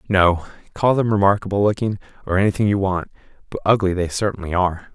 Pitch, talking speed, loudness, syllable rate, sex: 100 Hz, 160 wpm, -19 LUFS, 6.4 syllables/s, male